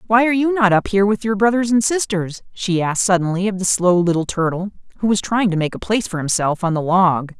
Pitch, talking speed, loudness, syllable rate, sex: 195 Hz, 250 wpm, -18 LUFS, 6.2 syllables/s, female